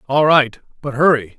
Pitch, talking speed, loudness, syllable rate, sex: 135 Hz, 130 wpm, -15 LUFS, 5.0 syllables/s, male